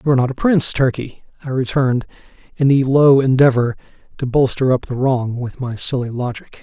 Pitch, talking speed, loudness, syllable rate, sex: 130 Hz, 190 wpm, -17 LUFS, 6.1 syllables/s, male